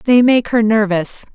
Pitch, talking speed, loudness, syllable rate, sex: 220 Hz, 180 wpm, -14 LUFS, 4.0 syllables/s, female